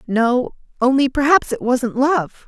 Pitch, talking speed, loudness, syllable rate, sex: 255 Hz, 145 wpm, -17 LUFS, 3.9 syllables/s, female